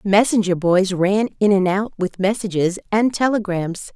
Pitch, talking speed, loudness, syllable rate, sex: 200 Hz, 150 wpm, -19 LUFS, 4.5 syllables/s, female